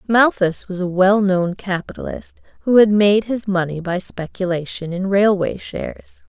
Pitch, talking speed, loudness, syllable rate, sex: 195 Hz, 140 wpm, -18 LUFS, 4.4 syllables/s, female